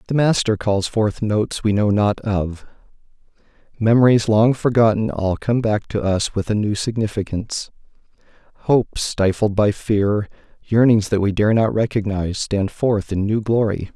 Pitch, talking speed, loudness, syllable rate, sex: 105 Hz, 155 wpm, -19 LUFS, 4.7 syllables/s, male